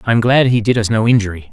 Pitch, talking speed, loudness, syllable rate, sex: 115 Hz, 315 wpm, -14 LUFS, 7.1 syllables/s, male